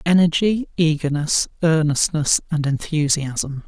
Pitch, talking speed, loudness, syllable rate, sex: 155 Hz, 80 wpm, -19 LUFS, 4.0 syllables/s, male